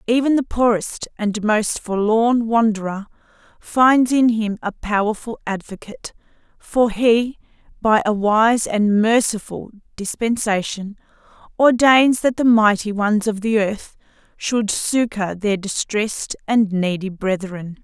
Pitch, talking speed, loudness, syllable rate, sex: 215 Hz, 120 wpm, -18 LUFS, 3.9 syllables/s, female